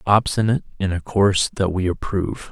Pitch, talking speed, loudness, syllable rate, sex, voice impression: 95 Hz, 165 wpm, -20 LUFS, 5.9 syllables/s, male, masculine, slightly old, thick, cool, calm, wild